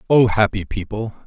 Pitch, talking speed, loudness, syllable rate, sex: 105 Hz, 140 wpm, -19 LUFS, 5.0 syllables/s, male